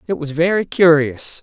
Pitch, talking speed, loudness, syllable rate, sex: 160 Hz, 170 wpm, -16 LUFS, 4.7 syllables/s, male